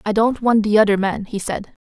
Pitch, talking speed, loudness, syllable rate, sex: 210 Hz, 255 wpm, -18 LUFS, 5.4 syllables/s, female